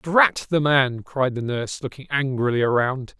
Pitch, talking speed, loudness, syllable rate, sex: 135 Hz, 170 wpm, -22 LUFS, 4.6 syllables/s, male